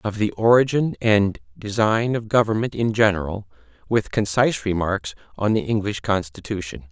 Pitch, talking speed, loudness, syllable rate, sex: 105 Hz, 140 wpm, -21 LUFS, 5.0 syllables/s, male